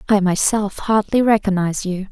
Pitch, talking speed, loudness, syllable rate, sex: 200 Hz, 140 wpm, -18 LUFS, 5.2 syllables/s, female